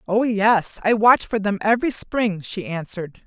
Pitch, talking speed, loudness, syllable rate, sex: 205 Hz, 185 wpm, -20 LUFS, 4.6 syllables/s, female